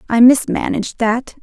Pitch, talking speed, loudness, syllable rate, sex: 235 Hz, 125 wpm, -15 LUFS, 5.0 syllables/s, female